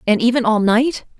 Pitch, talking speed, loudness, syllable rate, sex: 235 Hz, 200 wpm, -16 LUFS, 5.3 syllables/s, female